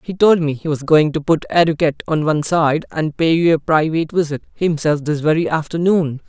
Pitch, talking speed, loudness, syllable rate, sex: 155 Hz, 210 wpm, -17 LUFS, 5.6 syllables/s, male